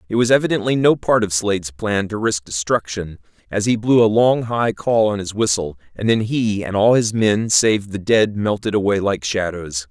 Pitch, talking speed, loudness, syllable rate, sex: 105 Hz, 210 wpm, -18 LUFS, 4.9 syllables/s, male